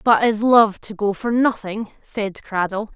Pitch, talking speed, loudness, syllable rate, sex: 215 Hz, 185 wpm, -19 LUFS, 4.1 syllables/s, female